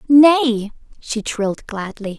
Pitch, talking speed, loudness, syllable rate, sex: 235 Hz, 110 wpm, -18 LUFS, 3.4 syllables/s, female